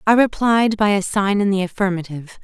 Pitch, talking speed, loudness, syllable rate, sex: 200 Hz, 195 wpm, -18 LUFS, 5.7 syllables/s, female